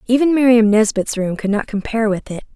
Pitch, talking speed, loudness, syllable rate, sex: 225 Hz, 210 wpm, -16 LUFS, 6.0 syllables/s, female